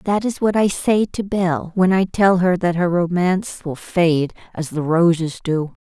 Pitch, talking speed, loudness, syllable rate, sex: 180 Hz, 205 wpm, -18 LUFS, 4.2 syllables/s, female